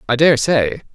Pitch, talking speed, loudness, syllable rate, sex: 130 Hz, 190 wpm, -15 LUFS, 4.4 syllables/s, male